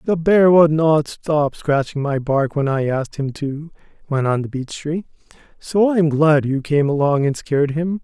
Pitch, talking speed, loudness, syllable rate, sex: 150 Hz, 210 wpm, -18 LUFS, 4.6 syllables/s, male